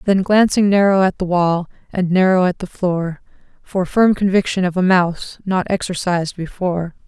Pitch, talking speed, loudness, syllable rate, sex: 185 Hz, 170 wpm, -17 LUFS, 5.0 syllables/s, female